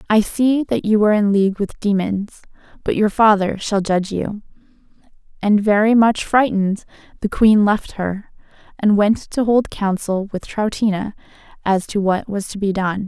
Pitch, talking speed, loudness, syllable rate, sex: 205 Hz, 170 wpm, -18 LUFS, 4.8 syllables/s, female